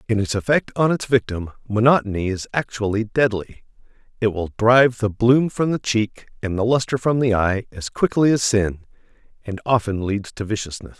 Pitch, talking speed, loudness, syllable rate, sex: 115 Hz, 175 wpm, -20 LUFS, 5.2 syllables/s, male